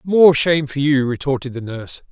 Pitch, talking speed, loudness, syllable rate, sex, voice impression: 140 Hz, 200 wpm, -17 LUFS, 5.6 syllables/s, male, masculine, adult-like, slightly fluent, slightly cool, sincere